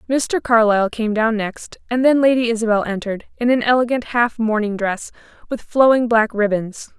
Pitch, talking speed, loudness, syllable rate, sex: 230 Hz, 170 wpm, -17 LUFS, 5.2 syllables/s, female